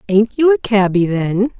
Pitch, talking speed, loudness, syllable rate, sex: 215 Hz, 190 wpm, -15 LUFS, 4.5 syllables/s, female